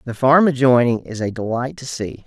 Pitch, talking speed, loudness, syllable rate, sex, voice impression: 125 Hz, 210 wpm, -18 LUFS, 5.1 syllables/s, male, very masculine, slightly young, adult-like, slightly thick, tensed, powerful, very bright, hard, very clear, slightly halting, cool, intellectual, very refreshing, sincere, calm, very friendly, very reassuring, slightly unique, slightly elegant, wild, sweet, very lively, kind, slightly strict, slightly modest